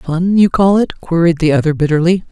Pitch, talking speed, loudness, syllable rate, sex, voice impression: 170 Hz, 205 wpm, -13 LUFS, 5.7 syllables/s, female, very feminine, middle-aged, slightly thin, tensed, powerful, slightly dark, soft, slightly muffled, fluent, slightly cool, intellectual, slightly refreshing, very sincere, calm, slightly friendly, slightly reassuring, very unique, slightly elegant, slightly wild, slightly sweet, slightly lively, kind, slightly modest